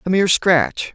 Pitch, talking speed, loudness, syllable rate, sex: 180 Hz, 190 wpm, -16 LUFS, 4.8 syllables/s, male